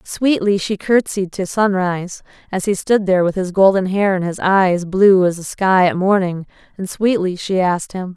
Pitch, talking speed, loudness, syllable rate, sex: 190 Hz, 200 wpm, -16 LUFS, 4.8 syllables/s, female